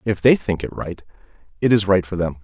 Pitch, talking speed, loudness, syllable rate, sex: 100 Hz, 245 wpm, -19 LUFS, 5.8 syllables/s, male